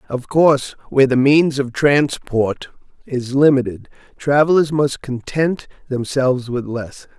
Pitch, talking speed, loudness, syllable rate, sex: 135 Hz, 125 wpm, -17 LUFS, 4.2 syllables/s, male